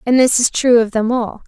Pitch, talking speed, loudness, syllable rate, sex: 235 Hz, 285 wpm, -14 LUFS, 5.3 syllables/s, female